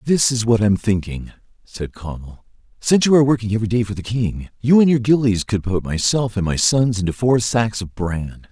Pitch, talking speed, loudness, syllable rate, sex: 110 Hz, 225 wpm, -18 LUFS, 5.5 syllables/s, male